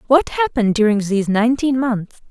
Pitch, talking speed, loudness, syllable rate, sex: 235 Hz, 155 wpm, -17 LUFS, 5.8 syllables/s, female